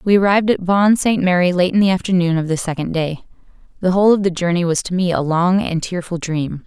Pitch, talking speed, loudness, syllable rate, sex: 180 Hz, 245 wpm, -17 LUFS, 6.2 syllables/s, female